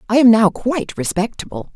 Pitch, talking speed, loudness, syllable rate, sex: 215 Hz, 170 wpm, -16 LUFS, 5.7 syllables/s, female